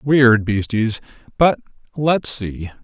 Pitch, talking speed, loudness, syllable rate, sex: 120 Hz, 85 wpm, -18 LUFS, 3.1 syllables/s, male